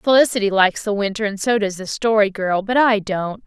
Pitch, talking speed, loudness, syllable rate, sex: 210 Hz, 225 wpm, -18 LUFS, 5.5 syllables/s, female